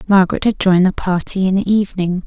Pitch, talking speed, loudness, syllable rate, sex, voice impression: 190 Hz, 210 wpm, -16 LUFS, 6.6 syllables/s, female, feminine, adult-like, relaxed, weak, soft, calm, friendly, reassuring, elegant, kind, modest